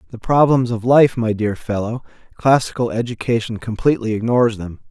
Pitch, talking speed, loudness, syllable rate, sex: 115 Hz, 135 wpm, -18 LUFS, 5.7 syllables/s, male